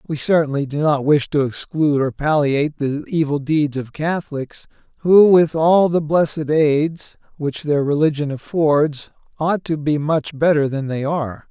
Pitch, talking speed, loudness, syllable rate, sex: 150 Hz, 165 wpm, -18 LUFS, 4.5 syllables/s, male